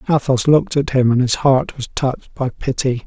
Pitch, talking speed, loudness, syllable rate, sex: 130 Hz, 215 wpm, -17 LUFS, 5.2 syllables/s, male